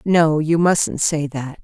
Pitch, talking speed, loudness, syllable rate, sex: 155 Hz, 185 wpm, -18 LUFS, 3.3 syllables/s, female